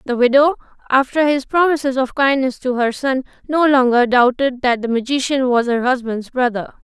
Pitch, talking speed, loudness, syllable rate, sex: 260 Hz, 175 wpm, -16 LUFS, 5.1 syllables/s, female